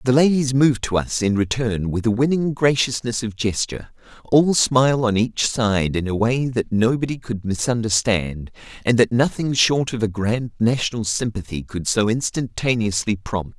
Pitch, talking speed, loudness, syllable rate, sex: 115 Hz, 170 wpm, -20 LUFS, 4.7 syllables/s, male